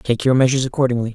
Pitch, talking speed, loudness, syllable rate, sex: 125 Hz, 210 wpm, -17 LUFS, 8.1 syllables/s, male